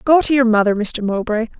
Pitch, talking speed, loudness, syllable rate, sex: 230 Hz, 225 wpm, -16 LUFS, 5.7 syllables/s, female